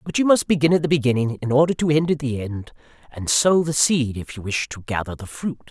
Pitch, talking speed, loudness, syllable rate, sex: 140 Hz, 265 wpm, -20 LUFS, 5.9 syllables/s, male